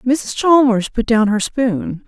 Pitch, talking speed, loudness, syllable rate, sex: 235 Hz, 175 wpm, -16 LUFS, 3.5 syllables/s, female